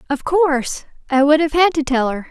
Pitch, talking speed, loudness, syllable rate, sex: 290 Hz, 235 wpm, -16 LUFS, 5.4 syllables/s, female